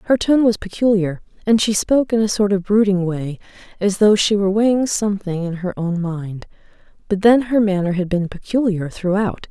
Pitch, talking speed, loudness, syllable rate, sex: 200 Hz, 195 wpm, -18 LUFS, 5.3 syllables/s, female